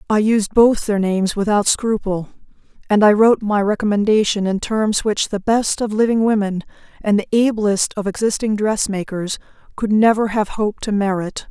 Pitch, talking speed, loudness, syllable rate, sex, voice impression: 210 Hz, 165 wpm, -17 LUFS, 5.1 syllables/s, female, very feminine, adult-like, slightly middle-aged, thin, tensed, powerful, slightly bright, hard, clear, slightly fluent, slightly cool, very intellectual, slightly refreshing, sincere, very calm, friendly, reassuring, elegant, slightly wild, slightly lively, slightly strict, slightly sharp